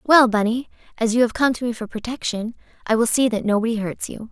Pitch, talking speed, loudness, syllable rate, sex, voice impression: 230 Hz, 235 wpm, -21 LUFS, 6.0 syllables/s, female, feminine, young, tensed, powerful, slightly bright, clear, fluent, nasal, cute, intellectual, friendly, unique, lively, slightly light